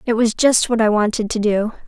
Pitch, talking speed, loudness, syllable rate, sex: 220 Hz, 255 wpm, -17 LUFS, 5.5 syllables/s, female